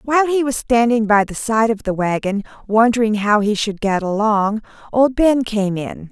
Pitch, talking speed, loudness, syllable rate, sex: 220 Hz, 195 wpm, -17 LUFS, 4.7 syllables/s, female